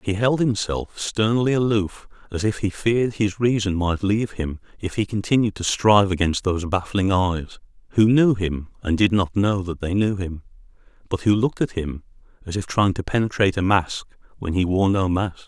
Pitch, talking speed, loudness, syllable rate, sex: 100 Hz, 200 wpm, -21 LUFS, 5.2 syllables/s, male